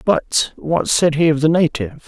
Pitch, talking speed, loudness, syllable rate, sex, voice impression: 155 Hz, 200 wpm, -17 LUFS, 4.7 syllables/s, male, very masculine, adult-like, slightly middle-aged, thick, slightly tensed, slightly powerful, slightly bright, slightly soft, slightly muffled, fluent, slightly raspy, cool, intellectual, sincere, very calm, slightly mature, friendly, slightly reassuring, unique, slightly wild, slightly sweet, kind, slightly modest